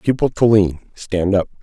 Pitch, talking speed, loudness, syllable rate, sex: 100 Hz, 150 wpm, -17 LUFS, 5.4 syllables/s, male